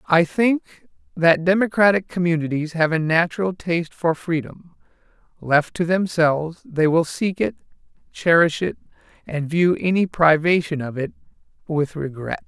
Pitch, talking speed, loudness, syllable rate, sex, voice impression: 165 Hz, 135 wpm, -20 LUFS, 4.6 syllables/s, male, masculine, slightly middle-aged, slightly relaxed, slightly powerful, bright, slightly hard, slightly clear, fluent, slightly raspy, slightly cool, intellectual, slightly refreshing, slightly sincere, calm, slightly friendly, slightly reassuring, very unique, slightly elegant, wild, slightly sweet, lively, kind, slightly intense